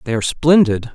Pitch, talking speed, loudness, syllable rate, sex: 135 Hz, 190 wpm, -15 LUFS, 6.0 syllables/s, male